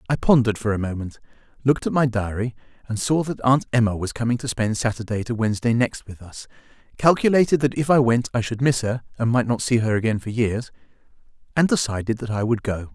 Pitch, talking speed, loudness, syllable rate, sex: 120 Hz, 220 wpm, -22 LUFS, 6.2 syllables/s, male